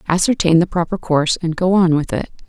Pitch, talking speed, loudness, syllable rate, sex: 170 Hz, 220 wpm, -17 LUFS, 5.9 syllables/s, female